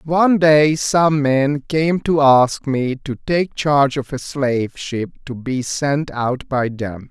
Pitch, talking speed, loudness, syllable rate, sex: 140 Hz, 175 wpm, -17 LUFS, 3.5 syllables/s, male